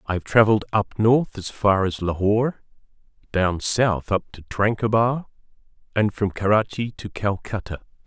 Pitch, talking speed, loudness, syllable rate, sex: 105 Hz, 140 wpm, -22 LUFS, 4.6 syllables/s, male